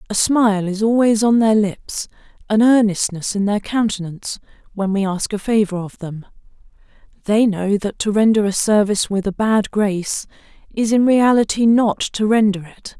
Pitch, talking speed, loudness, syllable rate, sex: 210 Hz, 170 wpm, -17 LUFS, 4.9 syllables/s, female